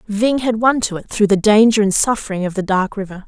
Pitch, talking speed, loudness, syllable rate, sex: 210 Hz, 255 wpm, -16 LUFS, 5.8 syllables/s, female